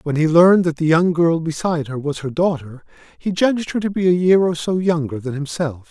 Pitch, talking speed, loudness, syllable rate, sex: 165 Hz, 245 wpm, -18 LUFS, 5.7 syllables/s, male